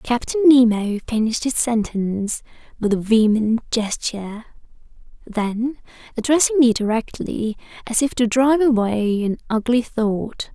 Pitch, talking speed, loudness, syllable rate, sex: 230 Hz, 120 wpm, -19 LUFS, 4.5 syllables/s, female